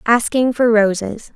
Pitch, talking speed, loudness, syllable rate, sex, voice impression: 225 Hz, 135 wpm, -15 LUFS, 4.1 syllables/s, female, feminine, slightly young, slightly cute, slightly sincere, slightly calm, friendly